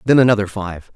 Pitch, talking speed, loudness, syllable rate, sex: 105 Hz, 190 wpm, -16 LUFS, 5.9 syllables/s, male